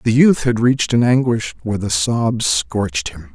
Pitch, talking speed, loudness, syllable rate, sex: 110 Hz, 200 wpm, -17 LUFS, 4.7 syllables/s, male